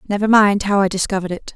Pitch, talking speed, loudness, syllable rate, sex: 200 Hz, 230 wpm, -16 LUFS, 7.3 syllables/s, female